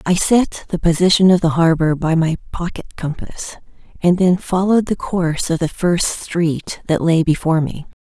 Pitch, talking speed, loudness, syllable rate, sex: 170 Hz, 180 wpm, -17 LUFS, 4.8 syllables/s, female